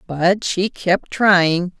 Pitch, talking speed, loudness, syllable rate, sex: 185 Hz, 135 wpm, -17 LUFS, 2.5 syllables/s, female